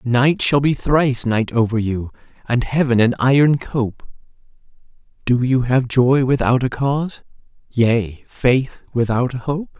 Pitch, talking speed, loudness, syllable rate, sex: 125 Hz, 145 wpm, -18 LUFS, 4.2 syllables/s, male